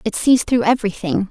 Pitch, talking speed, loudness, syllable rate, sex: 220 Hz, 185 wpm, -17 LUFS, 5.8 syllables/s, female